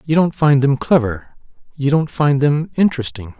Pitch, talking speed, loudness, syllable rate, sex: 140 Hz, 175 wpm, -16 LUFS, 5.0 syllables/s, male